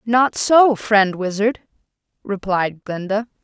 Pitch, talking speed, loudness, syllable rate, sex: 210 Hz, 105 wpm, -18 LUFS, 3.4 syllables/s, female